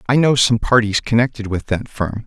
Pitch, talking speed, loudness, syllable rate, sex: 115 Hz, 210 wpm, -17 LUFS, 5.3 syllables/s, male